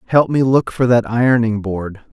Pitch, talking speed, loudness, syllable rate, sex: 115 Hz, 190 wpm, -16 LUFS, 4.9 syllables/s, male